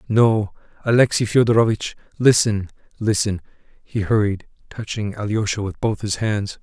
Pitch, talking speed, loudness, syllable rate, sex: 105 Hz, 120 wpm, -20 LUFS, 4.8 syllables/s, male